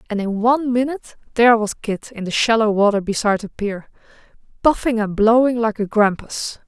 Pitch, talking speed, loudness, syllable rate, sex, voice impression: 220 Hz, 180 wpm, -18 LUFS, 5.6 syllables/s, female, very feminine, slightly young, thin, tensed, slightly powerful, bright, slightly hard, very clear, fluent, slightly raspy, cute, intellectual, very refreshing, sincere, calm, very friendly, reassuring, unique, slightly elegant, slightly wild, sweet, very lively, strict, intense, slightly sharp